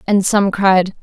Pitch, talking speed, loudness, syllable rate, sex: 195 Hz, 175 wpm, -14 LUFS, 3.6 syllables/s, female